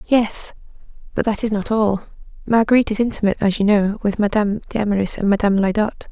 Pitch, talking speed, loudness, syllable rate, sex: 210 Hz, 175 wpm, -19 LUFS, 6.6 syllables/s, female